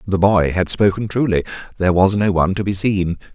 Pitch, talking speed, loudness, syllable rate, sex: 95 Hz, 215 wpm, -17 LUFS, 5.9 syllables/s, male